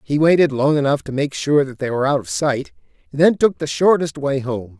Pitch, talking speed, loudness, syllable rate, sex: 135 Hz, 250 wpm, -18 LUFS, 5.6 syllables/s, male